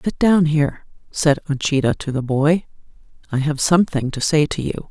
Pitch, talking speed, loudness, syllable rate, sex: 150 Hz, 185 wpm, -19 LUFS, 5.3 syllables/s, female